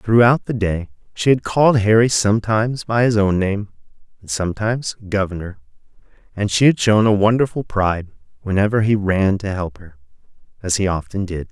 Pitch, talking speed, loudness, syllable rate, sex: 105 Hz, 165 wpm, -18 LUFS, 5.5 syllables/s, male